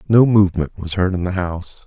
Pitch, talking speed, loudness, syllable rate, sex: 95 Hz, 225 wpm, -17 LUFS, 6.1 syllables/s, male